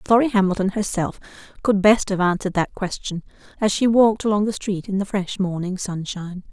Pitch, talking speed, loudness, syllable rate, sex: 195 Hz, 185 wpm, -21 LUFS, 5.7 syllables/s, female